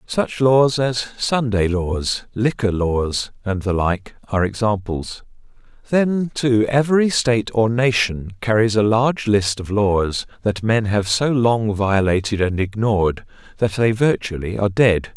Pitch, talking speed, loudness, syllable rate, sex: 110 Hz, 145 wpm, -19 LUFS, 4.1 syllables/s, male